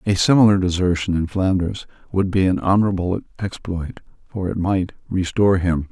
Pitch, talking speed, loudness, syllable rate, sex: 95 Hz, 150 wpm, -20 LUFS, 5.3 syllables/s, male